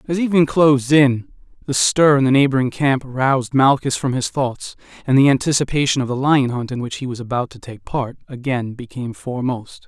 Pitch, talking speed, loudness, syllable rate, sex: 130 Hz, 200 wpm, -18 LUFS, 5.7 syllables/s, male